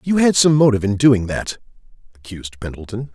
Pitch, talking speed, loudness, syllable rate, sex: 115 Hz, 170 wpm, -16 LUFS, 6.1 syllables/s, male